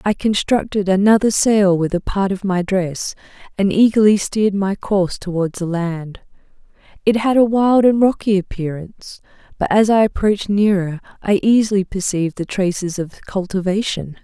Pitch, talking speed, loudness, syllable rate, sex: 195 Hz, 155 wpm, -17 LUFS, 5.0 syllables/s, female